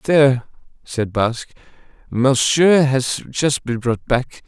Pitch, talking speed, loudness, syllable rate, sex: 130 Hz, 120 wpm, -18 LUFS, 3.0 syllables/s, male